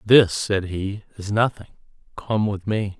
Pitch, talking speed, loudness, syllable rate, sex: 100 Hz, 160 wpm, -22 LUFS, 4.0 syllables/s, male